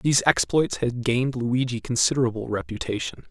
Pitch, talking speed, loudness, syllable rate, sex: 125 Hz, 125 wpm, -24 LUFS, 5.6 syllables/s, male